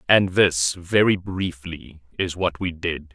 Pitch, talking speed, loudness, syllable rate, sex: 90 Hz, 155 wpm, -22 LUFS, 3.6 syllables/s, male